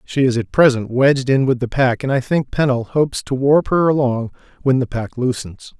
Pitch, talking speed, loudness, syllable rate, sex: 130 Hz, 230 wpm, -17 LUFS, 5.2 syllables/s, male